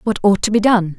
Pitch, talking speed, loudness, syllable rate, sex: 205 Hz, 305 wpm, -15 LUFS, 5.9 syllables/s, female